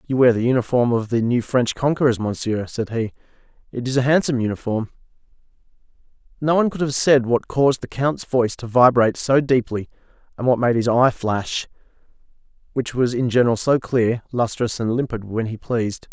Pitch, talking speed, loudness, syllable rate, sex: 120 Hz, 180 wpm, -20 LUFS, 5.6 syllables/s, male